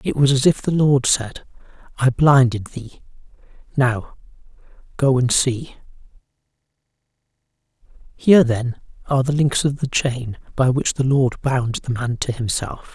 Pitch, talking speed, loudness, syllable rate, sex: 130 Hz, 145 wpm, -19 LUFS, 4.4 syllables/s, male